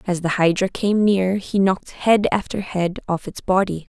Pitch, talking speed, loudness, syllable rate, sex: 190 Hz, 195 wpm, -20 LUFS, 4.7 syllables/s, female